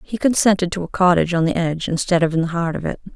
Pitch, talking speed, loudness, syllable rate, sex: 175 Hz, 285 wpm, -19 LUFS, 7.2 syllables/s, female